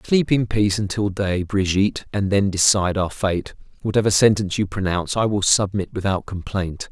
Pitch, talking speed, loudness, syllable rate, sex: 100 Hz, 175 wpm, -20 LUFS, 5.5 syllables/s, male